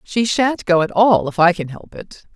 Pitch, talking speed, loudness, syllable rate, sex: 190 Hz, 255 wpm, -16 LUFS, 4.7 syllables/s, female